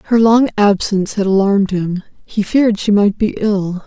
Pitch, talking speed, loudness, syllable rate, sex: 205 Hz, 185 wpm, -14 LUFS, 5.1 syllables/s, female